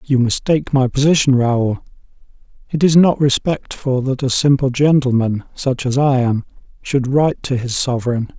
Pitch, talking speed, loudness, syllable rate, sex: 130 Hz, 155 wpm, -16 LUFS, 4.9 syllables/s, male